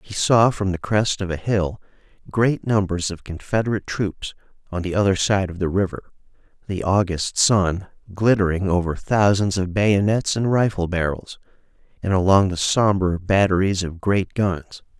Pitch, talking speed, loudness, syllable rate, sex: 95 Hz, 155 wpm, -20 LUFS, 4.6 syllables/s, male